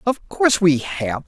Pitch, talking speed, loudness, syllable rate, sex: 165 Hz, 190 wpm, -19 LUFS, 4.4 syllables/s, male